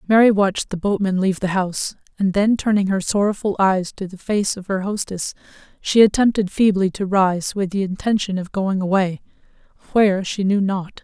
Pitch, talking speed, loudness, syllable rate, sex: 195 Hz, 180 wpm, -19 LUFS, 5.3 syllables/s, female